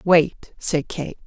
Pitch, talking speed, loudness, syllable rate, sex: 160 Hz, 145 wpm, -22 LUFS, 2.8 syllables/s, female